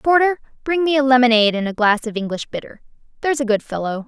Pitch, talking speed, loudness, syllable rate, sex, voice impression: 245 Hz, 220 wpm, -18 LUFS, 6.8 syllables/s, female, very feminine, very young, very thin, very tensed, powerful, very bright, very hard, very clear, fluent, very cute, intellectual, very refreshing, sincere, slightly calm, very friendly, slightly reassuring, very unique, elegant, sweet, very lively, strict, slightly intense, sharp